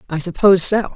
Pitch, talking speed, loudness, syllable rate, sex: 185 Hz, 190 wpm, -15 LUFS, 6.7 syllables/s, female